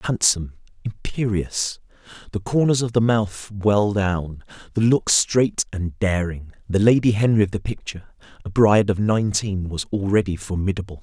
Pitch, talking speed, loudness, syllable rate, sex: 100 Hz, 140 wpm, -21 LUFS, 5.0 syllables/s, male